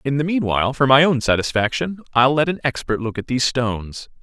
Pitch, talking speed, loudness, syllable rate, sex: 135 Hz, 215 wpm, -19 LUFS, 6.0 syllables/s, male